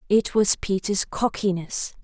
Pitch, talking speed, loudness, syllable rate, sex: 195 Hz, 120 wpm, -23 LUFS, 4.1 syllables/s, female